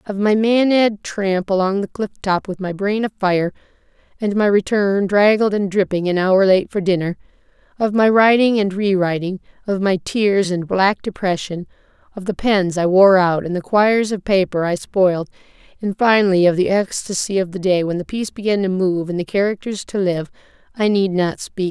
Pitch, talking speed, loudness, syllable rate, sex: 195 Hz, 195 wpm, -18 LUFS, 5.1 syllables/s, female